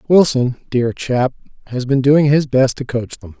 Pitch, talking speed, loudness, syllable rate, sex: 130 Hz, 195 wpm, -16 LUFS, 4.4 syllables/s, male